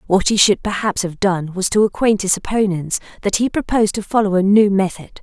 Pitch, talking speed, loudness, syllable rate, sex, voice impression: 200 Hz, 220 wpm, -17 LUFS, 5.6 syllables/s, female, very feminine, slightly young, very thin, slightly relaxed, powerful, bright, soft, very clear, fluent, slightly raspy, cute, intellectual, very refreshing, sincere, slightly calm, friendly, reassuring, very unique, slightly elegant, slightly wild, sweet, lively, slightly strict, slightly intense, slightly sharp, slightly light